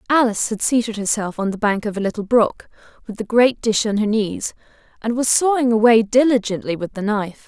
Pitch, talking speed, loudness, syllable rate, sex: 220 Hz, 210 wpm, -18 LUFS, 5.8 syllables/s, female